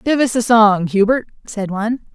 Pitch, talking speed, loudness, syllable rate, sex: 220 Hz, 195 wpm, -16 LUFS, 5.1 syllables/s, female